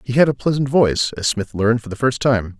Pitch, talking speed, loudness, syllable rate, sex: 120 Hz, 275 wpm, -18 LUFS, 6.1 syllables/s, male